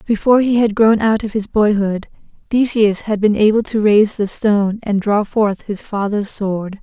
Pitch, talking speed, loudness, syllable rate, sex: 210 Hz, 195 wpm, -16 LUFS, 4.8 syllables/s, female